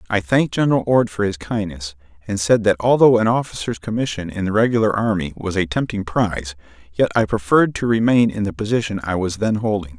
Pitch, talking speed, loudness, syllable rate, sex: 105 Hz, 205 wpm, -19 LUFS, 6.0 syllables/s, male